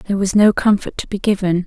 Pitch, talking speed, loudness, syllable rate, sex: 195 Hz, 255 wpm, -16 LUFS, 6.1 syllables/s, female